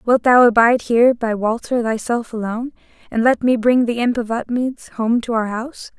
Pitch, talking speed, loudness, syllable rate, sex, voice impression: 235 Hz, 200 wpm, -17 LUFS, 5.3 syllables/s, female, very feminine, young, thin, tensed, powerful, bright, very hard, very clear, very fluent, slightly raspy, cute, very intellectual, very refreshing, sincere, very calm, friendly, very reassuring, very unique, very elegant, slightly wild, sweet, slightly lively, slightly strict, slightly intense, sharp